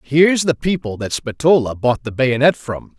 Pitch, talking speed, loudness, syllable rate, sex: 135 Hz, 180 wpm, -17 LUFS, 4.8 syllables/s, male